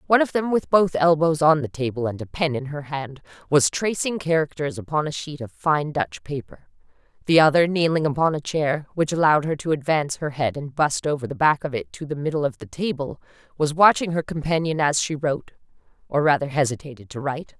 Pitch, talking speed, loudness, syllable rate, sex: 150 Hz, 215 wpm, -22 LUFS, 5.8 syllables/s, female